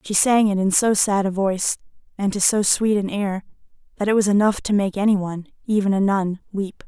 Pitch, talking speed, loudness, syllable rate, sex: 200 Hz, 225 wpm, -20 LUFS, 5.6 syllables/s, female